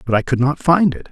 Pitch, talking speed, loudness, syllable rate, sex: 140 Hz, 320 wpm, -16 LUFS, 6.1 syllables/s, male